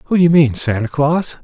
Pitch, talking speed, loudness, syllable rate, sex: 145 Hz, 165 wpm, -15 LUFS, 4.4 syllables/s, male